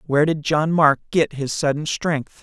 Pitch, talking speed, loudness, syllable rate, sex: 150 Hz, 200 wpm, -20 LUFS, 4.6 syllables/s, male